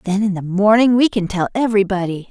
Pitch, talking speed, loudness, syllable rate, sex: 200 Hz, 210 wpm, -16 LUFS, 6.2 syllables/s, female